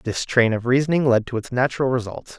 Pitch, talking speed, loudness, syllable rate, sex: 125 Hz, 225 wpm, -20 LUFS, 6.0 syllables/s, male